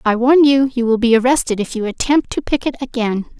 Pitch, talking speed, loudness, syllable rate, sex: 245 Hz, 230 wpm, -16 LUFS, 5.8 syllables/s, female